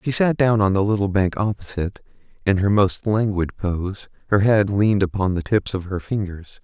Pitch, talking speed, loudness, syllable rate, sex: 100 Hz, 190 wpm, -21 LUFS, 5.1 syllables/s, male